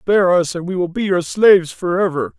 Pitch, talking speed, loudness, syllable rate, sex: 170 Hz, 225 wpm, -16 LUFS, 5.6 syllables/s, male